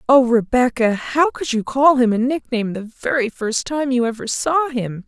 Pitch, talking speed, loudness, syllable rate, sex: 250 Hz, 200 wpm, -18 LUFS, 4.7 syllables/s, female